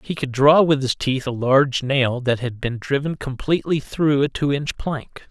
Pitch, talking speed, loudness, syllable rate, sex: 135 Hz, 215 wpm, -20 LUFS, 4.6 syllables/s, male